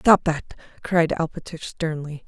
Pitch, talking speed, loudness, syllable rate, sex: 160 Hz, 130 wpm, -24 LUFS, 4.3 syllables/s, female